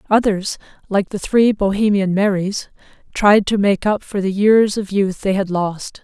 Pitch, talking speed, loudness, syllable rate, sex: 200 Hz, 180 wpm, -17 LUFS, 4.3 syllables/s, female